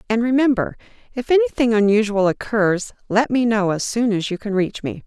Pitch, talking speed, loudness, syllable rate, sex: 220 Hz, 190 wpm, -19 LUFS, 5.2 syllables/s, female